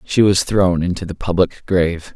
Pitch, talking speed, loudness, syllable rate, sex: 90 Hz, 195 wpm, -17 LUFS, 5.0 syllables/s, male